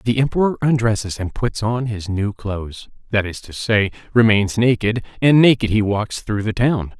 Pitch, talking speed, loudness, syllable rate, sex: 110 Hz, 190 wpm, -18 LUFS, 4.9 syllables/s, male